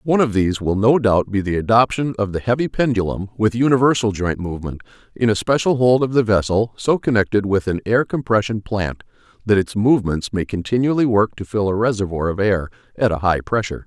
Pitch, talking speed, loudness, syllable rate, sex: 110 Hz, 205 wpm, -18 LUFS, 5.9 syllables/s, male